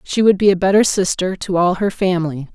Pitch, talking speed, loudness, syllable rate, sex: 185 Hz, 235 wpm, -16 LUFS, 5.8 syllables/s, female